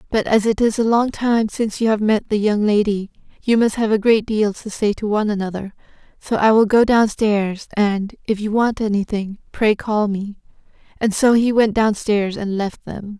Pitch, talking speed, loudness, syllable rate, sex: 215 Hz, 210 wpm, -18 LUFS, 4.8 syllables/s, female